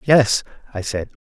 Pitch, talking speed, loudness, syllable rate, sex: 115 Hz, 145 wpm, -20 LUFS, 4.1 syllables/s, male